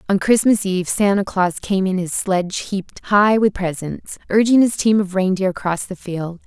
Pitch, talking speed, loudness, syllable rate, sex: 190 Hz, 195 wpm, -18 LUFS, 4.9 syllables/s, female